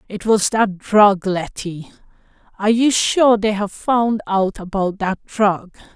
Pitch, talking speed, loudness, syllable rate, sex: 205 Hz, 140 wpm, -17 LUFS, 3.7 syllables/s, female